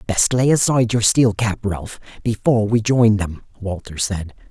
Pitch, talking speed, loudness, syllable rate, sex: 105 Hz, 175 wpm, -18 LUFS, 4.7 syllables/s, male